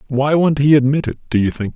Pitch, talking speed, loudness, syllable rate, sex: 140 Hz, 275 wpm, -16 LUFS, 6.3 syllables/s, male